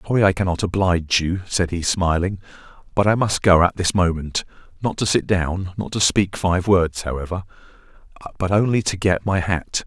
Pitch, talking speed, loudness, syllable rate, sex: 90 Hz, 180 wpm, -20 LUFS, 5.4 syllables/s, male